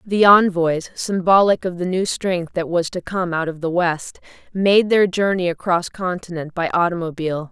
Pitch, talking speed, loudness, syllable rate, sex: 180 Hz, 175 wpm, -19 LUFS, 4.7 syllables/s, female